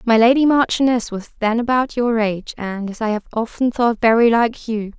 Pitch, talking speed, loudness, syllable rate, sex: 230 Hz, 205 wpm, -18 LUFS, 5.2 syllables/s, female